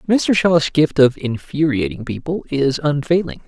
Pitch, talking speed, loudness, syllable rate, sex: 150 Hz, 140 wpm, -17 LUFS, 4.4 syllables/s, male